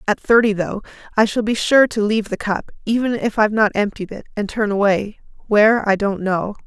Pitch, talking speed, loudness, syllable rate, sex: 210 Hz, 205 wpm, -18 LUFS, 5.6 syllables/s, female